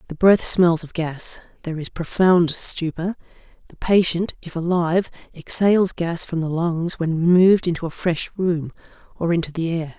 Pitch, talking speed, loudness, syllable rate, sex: 170 Hz, 170 wpm, -20 LUFS, 4.8 syllables/s, female